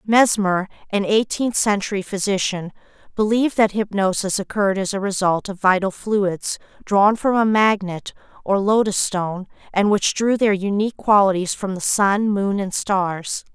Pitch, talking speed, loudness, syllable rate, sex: 200 Hz, 145 wpm, -19 LUFS, 4.6 syllables/s, female